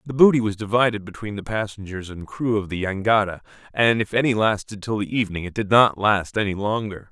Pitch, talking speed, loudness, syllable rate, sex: 105 Hz, 210 wpm, -21 LUFS, 5.9 syllables/s, male